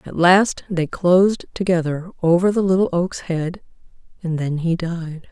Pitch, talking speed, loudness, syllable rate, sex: 175 Hz, 160 wpm, -19 LUFS, 4.4 syllables/s, female